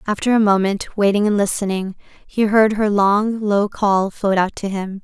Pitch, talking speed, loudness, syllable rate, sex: 205 Hz, 190 wpm, -17 LUFS, 4.5 syllables/s, female